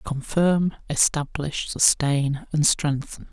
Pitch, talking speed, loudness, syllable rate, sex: 150 Hz, 90 wpm, -22 LUFS, 3.3 syllables/s, male